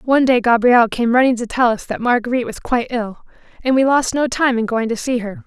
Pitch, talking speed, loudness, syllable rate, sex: 240 Hz, 255 wpm, -17 LUFS, 6.0 syllables/s, female